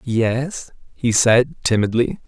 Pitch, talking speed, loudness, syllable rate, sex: 120 Hz, 105 wpm, -18 LUFS, 3.3 syllables/s, male